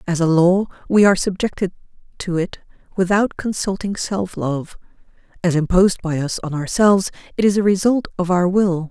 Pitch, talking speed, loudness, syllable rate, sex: 185 Hz, 170 wpm, -18 LUFS, 5.3 syllables/s, female